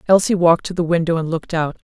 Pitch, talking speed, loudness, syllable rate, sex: 170 Hz, 250 wpm, -18 LUFS, 7.2 syllables/s, female